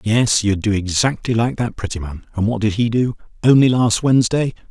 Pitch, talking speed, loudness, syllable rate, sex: 115 Hz, 190 wpm, -17 LUFS, 5.4 syllables/s, male